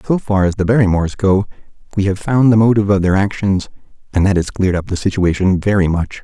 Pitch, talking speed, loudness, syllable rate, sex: 100 Hz, 220 wpm, -15 LUFS, 6.5 syllables/s, male